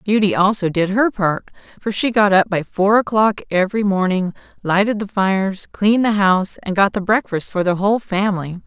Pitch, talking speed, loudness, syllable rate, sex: 195 Hz, 195 wpm, -17 LUFS, 5.4 syllables/s, female